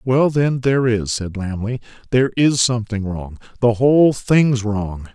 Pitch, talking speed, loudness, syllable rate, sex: 115 Hz, 165 wpm, -18 LUFS, 4.6 syllables/s, male